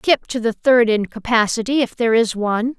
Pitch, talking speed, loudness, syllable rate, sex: 230 Hz, 195 wpm, -18 LUFS, 5.5 syllables/s, female